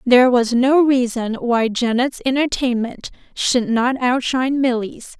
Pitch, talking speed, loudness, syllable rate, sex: 250 Hz, 140 wpm, -18 LUFS, 4.2 syllables/s, female